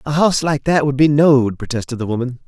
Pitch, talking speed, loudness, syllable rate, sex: 140 Hz, 240 wpm, -16 LUFS, 6.1 syllables/s, male